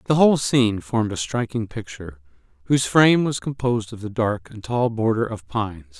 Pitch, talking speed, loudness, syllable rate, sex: 115 Hz, 190 wpm, -21 LUFS, 5.8 syllables/s, male